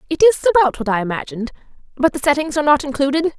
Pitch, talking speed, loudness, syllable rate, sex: 290 Hz, 195 wpm, -17 LUFS, 7.8 syllables/s, female